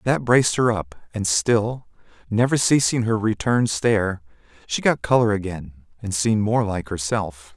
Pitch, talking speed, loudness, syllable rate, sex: 110 Hz, 145 wpm, -21 LUFS, 4.6 syllables/s, male